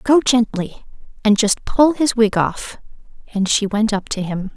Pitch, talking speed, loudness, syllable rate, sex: 220 Hz, 185 wpm, -18 LUFS, 4.2 syllables/s, female